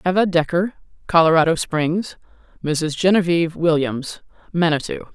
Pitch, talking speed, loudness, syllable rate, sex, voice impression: 165 Hz, 95 wpm, -19 LUFS, 4.8 syllables/s, female, feminine, adult-like, slightly clear, intellectual